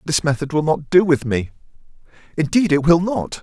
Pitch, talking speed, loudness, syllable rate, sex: 155 Hz, 210 wpm, -18 LUFS, 5.7 syllables/s, male